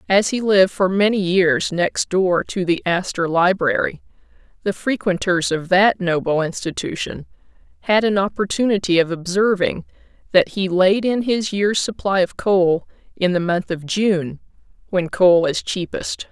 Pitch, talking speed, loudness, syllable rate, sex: 185 Hz, 150 wpm, -19 LUFS, 4.4 syllables/s, female